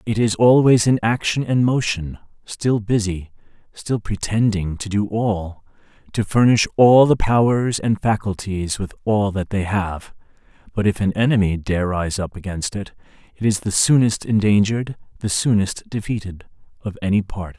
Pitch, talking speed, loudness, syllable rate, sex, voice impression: 105 Hz, 155 wpm, -19 LUFS, 4.6 syllables/s, male, masculine, adult-like, tensed, hard, clear, cool, intellectual, sincere, calm, wild, slightly lively, slightly strict, modest